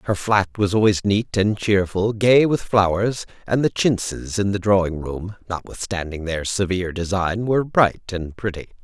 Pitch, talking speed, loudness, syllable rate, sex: 100 Hz, 170 wpm, -21 LUFS, 4.7 syllables/s, male